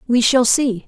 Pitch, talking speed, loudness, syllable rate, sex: 245 Hz, 205 wpm, -15 LUFS, 4.1 syllables/s, female